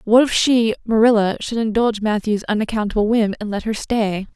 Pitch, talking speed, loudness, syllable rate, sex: 220 Hz, 180 wpm, -18 LUFS, 5.5 syllables/s, female